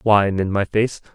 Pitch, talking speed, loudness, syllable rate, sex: 100 Hz, 210 wpm, -20 LUFS, 4.3 syllables/s, male